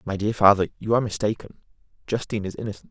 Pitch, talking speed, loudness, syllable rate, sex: 105 Hz, 185 wpm, -23 LUFS, 7.7 syllables/s, male